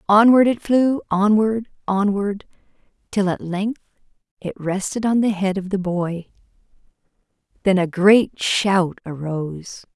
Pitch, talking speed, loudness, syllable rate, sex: 195 Hz, 125 wpm, -19 LUFS, 4.0 syllables/s, female